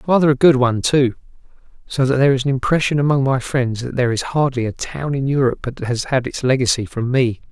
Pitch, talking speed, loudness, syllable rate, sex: 130 Hz, 230 wpm, -18 LUFS, 6.3 syllables/s, male